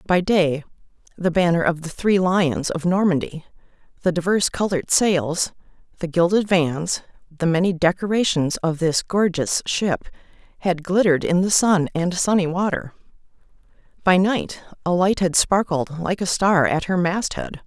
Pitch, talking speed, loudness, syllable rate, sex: 175 Hz, 155 wpm, -20 LUFS, 4.6 syllables/s, female